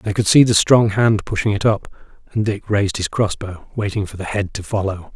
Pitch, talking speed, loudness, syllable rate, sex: 100 Hz, 245 wpm, -18 LUFS, 5.4 syllables/s, male